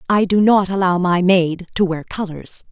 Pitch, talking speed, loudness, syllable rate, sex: 185 Hz, 200 wpm, -17 LUFS, 4.6 syllables/s, female